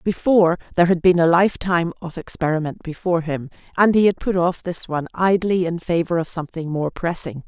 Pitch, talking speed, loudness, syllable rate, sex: 170 Hz, 195 wpm, -20 LUFS, 6.1 syllables/s, female